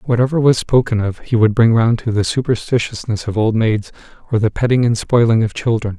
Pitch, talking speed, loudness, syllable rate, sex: 115 Hz, 210 wpm, -16 LUFS, 5.6 syllables/s, male